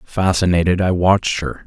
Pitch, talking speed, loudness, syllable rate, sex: 90 Hz, 145 wpm, -17 LUFS, 5.1 syllables/s, male